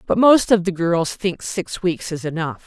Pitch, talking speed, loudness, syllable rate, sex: 180 Hz, 225 wpm, -19 LUFS, 4.4 syllables/s, female